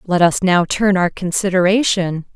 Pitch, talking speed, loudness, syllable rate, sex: 185 Hz, 155 wpm, -16 LUFS, 4.7 syllables/s, female